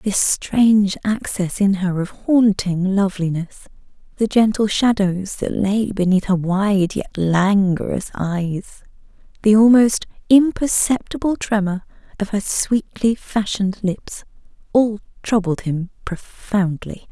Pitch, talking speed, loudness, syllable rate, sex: 200 Hz, 110 wpm, -18 LUFS, 3.9 syllables/s, female